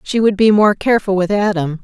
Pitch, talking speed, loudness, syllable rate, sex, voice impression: 200 Hz, 230 wpm, -14 LUFS, 5.8 syllables/s, female, feminine, very adult-like, slightly thick, slightly cool, intellectual, calm, elegant